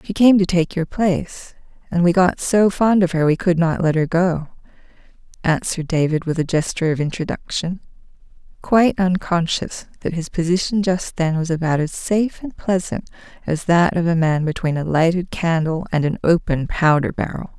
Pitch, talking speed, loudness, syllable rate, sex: 170 Hz, 180 wpm, -19 LUFS, 5.1 syllables/s, female